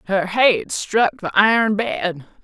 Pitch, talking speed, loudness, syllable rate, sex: 205 Hz, 150 wpm, -18 LUFS, 3.4 syllables/s, female